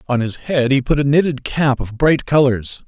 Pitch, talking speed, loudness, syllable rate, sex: 135 Hz, 230 wpm, -17 LUFS, 4.8 syllables/s, male